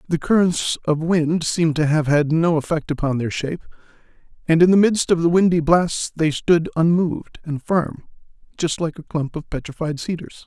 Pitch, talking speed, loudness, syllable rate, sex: 160 Hz, 190 wpm, -19 LUFS, 5.0 syllables/s, male